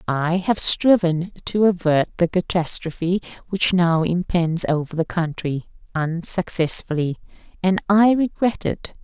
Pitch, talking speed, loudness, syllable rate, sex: 175 Hz, 120 wpm, -20 LUFS, 4.1 syllables/s, female